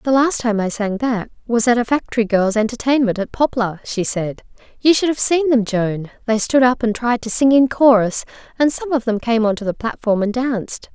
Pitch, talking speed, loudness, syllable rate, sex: 235 Hz, 230 wpm, -17 LUFS, 5.3 syllables/s, female